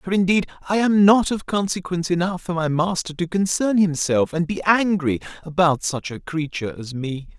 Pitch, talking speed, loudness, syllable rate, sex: 175 Hz, 185 wpm, -21 LUFS, 5.2 syllables/s, male